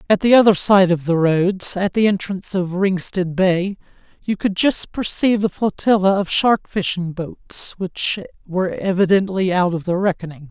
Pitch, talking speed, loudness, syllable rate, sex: 185 Hz, 170 wpm, -18 LUFS, 4.7 syllables/s, male